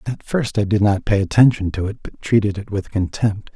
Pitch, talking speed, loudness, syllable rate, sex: 105 Hz, 235 wpm, -19 LUFS, 5.3 syllables/s, male